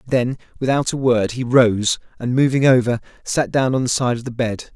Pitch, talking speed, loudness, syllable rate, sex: 125 Hz, 215 wpm, -19 LUFS, 5.1 syllables/s, male